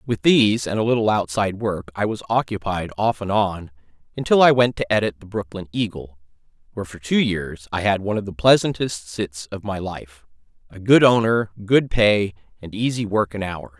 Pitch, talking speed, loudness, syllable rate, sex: 100 Hz, 190 wpm, -20 LUFS, 5.3 syllables/s, male